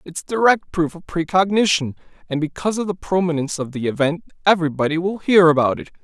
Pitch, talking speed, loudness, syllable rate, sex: 170 Hz, 180 wpm, -19 LUFS, 6.2 syllables/s, male